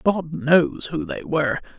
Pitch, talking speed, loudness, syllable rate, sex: 170 Hz, 170 wpm, -21 LUFS, 4.3 syllables/s, female